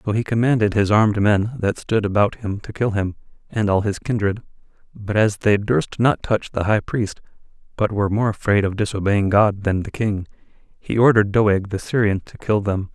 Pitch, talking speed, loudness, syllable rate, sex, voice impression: 105 Hz, 205 wpm, -20 LUFS, 5.1 syllables/s, male, masculine, adult-like, weak, slightly hard, fluent, intellectual, sincere, calm, slightly reassuring, modest